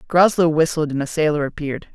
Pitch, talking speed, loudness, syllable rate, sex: 155 Hz, 185 wpm, -19 LUFS, 6.3 syllables/s, male